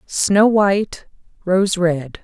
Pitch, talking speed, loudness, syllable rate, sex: 190 Hz, 110 wpm, -16 LUFS, 2.8 syllables/s, female